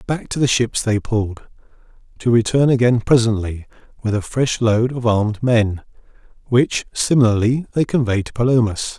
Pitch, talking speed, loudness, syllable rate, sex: 115 Hz, 155 wpm, -18 LUFS, 5.0 syllables/s, male